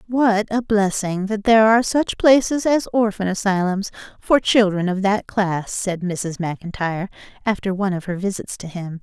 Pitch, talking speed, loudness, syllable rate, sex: 200 Hz, 175 wpm, -19 LUFS, 4.8 syllables/s, female